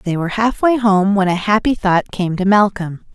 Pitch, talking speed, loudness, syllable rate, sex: 200 Hz, 210 wpm, -15 LUFS, 5.2 syllables/s, female